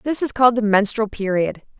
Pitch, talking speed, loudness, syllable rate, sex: 220 Hz, 200 wpm, -18 LUFS, 5.7 syllables/s, female